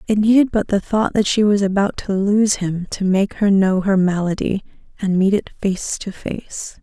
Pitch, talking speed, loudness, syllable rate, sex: 200 Hz, 210 wpm, -18 LUFS, 4.6 syllables/s, female